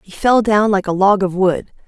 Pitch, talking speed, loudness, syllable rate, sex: 200 Hz, 255 wpm, -15 LUFS, 4.8 syllables/s, female